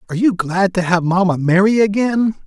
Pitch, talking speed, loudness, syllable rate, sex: 190 Hz, 195 wpm, -15 LUFS, 5.5 syllables/s, male